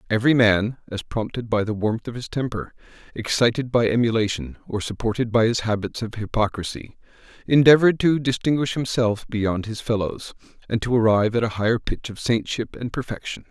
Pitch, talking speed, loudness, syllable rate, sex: 115 Hz, 170 wpm, -22 LUFS, 5.6 syllables/s, male